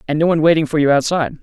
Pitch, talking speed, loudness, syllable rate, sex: 155 Hz, 295 wpm, -15 LUFS, 8.8 syllables/s, male